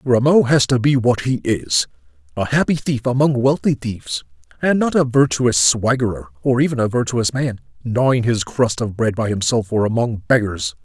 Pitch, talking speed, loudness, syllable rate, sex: 115 Hz, 175 wpm, -18 LUFS, 5.0 syllables/s, male